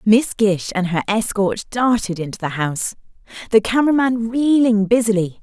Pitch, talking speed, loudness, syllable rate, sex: 210 Hz, 155 wpm, -18 LUFS, 5.0 syllables/s, female